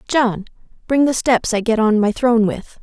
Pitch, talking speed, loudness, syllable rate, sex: 225 Hz, 210 wpm, -17 LUFS, 4.9 syllables/s, female